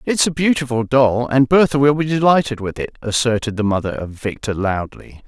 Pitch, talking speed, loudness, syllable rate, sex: 125 Hz, 195 wpm, -17 LUFS, 5.3 syllables/s, male